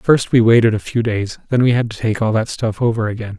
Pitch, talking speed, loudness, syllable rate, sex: 115 Hz, 285 wpm, -16 LUFS, 5.9 syllables/s, male